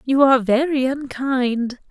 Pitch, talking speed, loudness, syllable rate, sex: 260 Hz, 125 wpm, -19 LUFS, 4.1 syllables/s, female